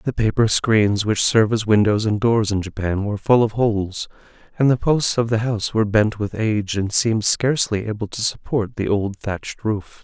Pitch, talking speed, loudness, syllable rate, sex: 110 Hz, 210 wpm, -19 LUFS, 5.3 syllables/s, male